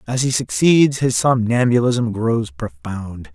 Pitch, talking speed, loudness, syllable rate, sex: 115 Hz, 125 wpm, -17 LUFS, 3.8 syllables/s, male